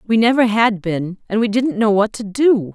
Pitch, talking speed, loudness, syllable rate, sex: 215 Hz, 240 wpm, -17 LUFS, 4.7 syllables/s, female